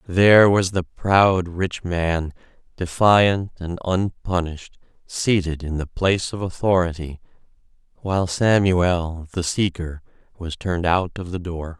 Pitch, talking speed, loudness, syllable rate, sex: 90 Hz, 125 wpm, -20 LUFS, 4.1 syllables/s, male